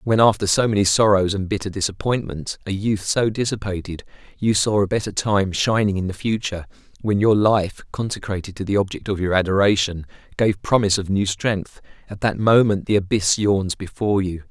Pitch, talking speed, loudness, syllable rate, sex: 100 Hz, 180 wpm, -20 LUFS, 5.5 syllables/s, male